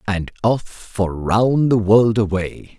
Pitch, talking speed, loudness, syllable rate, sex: 105 Hz, 150 wpm, -18 LUFS, 3.2 syllables/s, male